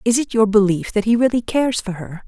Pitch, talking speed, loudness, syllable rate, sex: 215 Hz, 265 wpm, -18 LUFS, 6.1 syllables/s, female